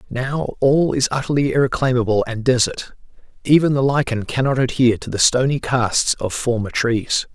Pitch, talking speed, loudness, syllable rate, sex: 125 Hz, 155 wpm, -18 LUFS, 5.1 syllables/s, male